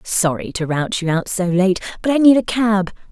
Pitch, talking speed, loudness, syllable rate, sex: 195 Hz, 230 wpm, -17 LUFS, 4.9 syllables/s, female